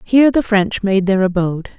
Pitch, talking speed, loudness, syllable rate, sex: 205 Hz, 200 wpm, -15 LUFS, 5.6 syllables/s, female